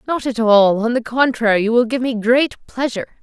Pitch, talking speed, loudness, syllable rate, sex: 235 Hz, 225 wpm, -16 LUFS, 5.7 syllables/s, female